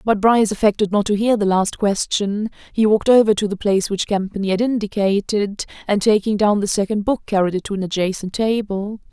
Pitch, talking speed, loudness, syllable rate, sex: 205 Hz, 205 wpm, -18 LUFS, 5.8 syllables/s, female